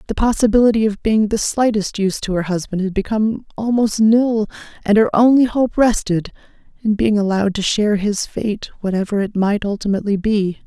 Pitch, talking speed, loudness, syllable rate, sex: 210 Hz, 175 wpm, -17 LUFS, 5.6 syllables/s, female